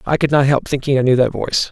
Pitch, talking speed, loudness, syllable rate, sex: 135 Hz, 315 wpm, -16 LUFS, 6.9 syllables/s, male